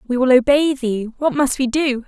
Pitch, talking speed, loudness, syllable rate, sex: 260 Hz, 230 wpm, -17 LUFS, 4.8 syllables/s, female